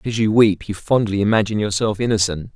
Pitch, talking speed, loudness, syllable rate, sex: 105 Hz, 190 wpm, -18 LUFS, 6.8 syllables/s, male